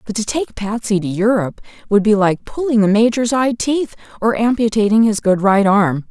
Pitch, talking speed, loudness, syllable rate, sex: 215 Hz, 195 wpm, -16 LUFS, 5.2 syllables/s, female